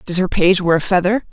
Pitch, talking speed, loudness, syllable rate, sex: 185 Hz, 275 wpm, -15 LUFS, 6.0 syllables/s, female